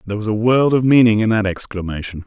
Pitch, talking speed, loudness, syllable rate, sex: 110 Hz, 240 wpm, -16 LUFS, 6.7 syllables/s, male